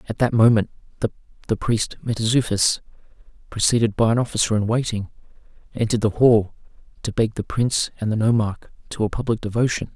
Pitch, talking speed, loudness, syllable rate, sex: 110 Hz, 155 wpm, -21 LUFS, 6.2 syllables/s, male